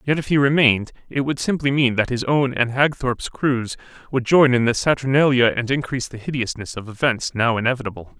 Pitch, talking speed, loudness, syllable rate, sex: 130 Hz, 200 wpm, -19 LUFS, 5.8 syllables/s, male